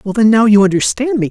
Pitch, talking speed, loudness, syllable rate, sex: 210 Hz, 275 wpm, -11 LUFS, 6.6 syllables/s, male